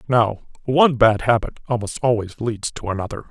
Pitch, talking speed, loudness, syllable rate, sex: 115 Hz, 165 wpm, -20 LUFS, 5.6 syllables/s, male